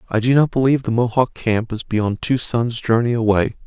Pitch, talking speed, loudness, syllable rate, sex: 120 Hz, 215 wpm, -18 LUFS, 5.3 syllables/s, male